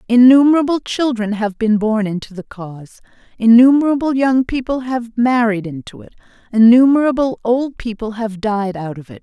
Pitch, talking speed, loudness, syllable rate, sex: 230 Hz, 150 wpm, -15 LUFS, 5.1 syllables/s, female